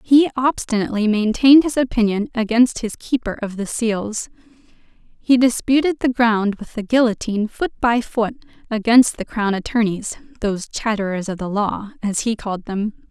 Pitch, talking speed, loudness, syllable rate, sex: 225 Hz, 155 wpm, -19 LUFS, 4.9 syllables/s, female